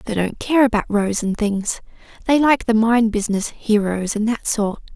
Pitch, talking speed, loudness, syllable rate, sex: 220 Hz, 195 wpm, -19 LUFS, 5.0 syllables/s, female